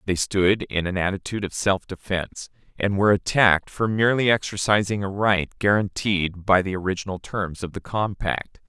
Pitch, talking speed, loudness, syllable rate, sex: 95 Hz, 165 wpm, -22 LUFS, 5.2 syllables/s, male